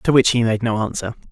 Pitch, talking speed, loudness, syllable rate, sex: 115 Hz, 275 wpm, -19 LUFS, 6.1 syllables/s, male